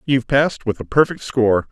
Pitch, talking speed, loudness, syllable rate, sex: 125 Hz, 210 wpm, -18 LUFS, 6.2 syllables/s, male